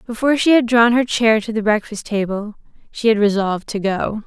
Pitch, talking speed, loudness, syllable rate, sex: 220 Hz, 210 wpm, -17 LUFS, 5.6 syllables/s, female